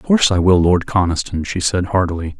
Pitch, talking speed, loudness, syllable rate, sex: 95 Hz, 225 wpm, -16 LUFS, 6.0 syllables/s, male